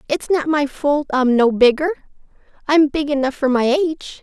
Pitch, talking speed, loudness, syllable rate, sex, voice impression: 285 Hz, 185 wpm, -17 LUFS, 5.0 syllables/s, female, feminine, slightly adult-like, slightly clear, fluent, slightly refreshing, slightly friendly